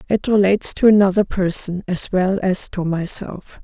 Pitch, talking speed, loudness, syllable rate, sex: 190 Hz, 165 wpm, -18 LUFS, 5.0 syllables/s, female